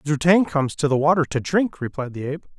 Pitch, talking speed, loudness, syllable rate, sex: 150 Hz, 255 wpm, -21 LUFS, 6.6 syllables/s, male